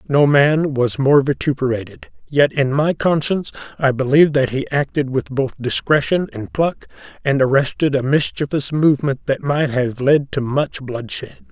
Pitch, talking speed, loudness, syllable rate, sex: 140 Hz, 160 wpm, -18 LUFS, 4.7 syllables/s, male